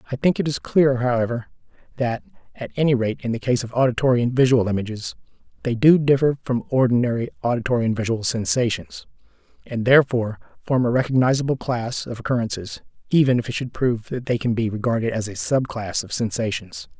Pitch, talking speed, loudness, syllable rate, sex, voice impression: 120 Hz, 180 wpm, -21 LUFS, 6.1 syllables/s, male, masculine, middle-aged, powerful, hard, slightly halting, raspy, mature, wild, lively, strict, intense, sharp